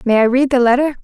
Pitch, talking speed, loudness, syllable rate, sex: 255 Hz, 290 wpm, -14 LUFS, 6.8 syllables/s, female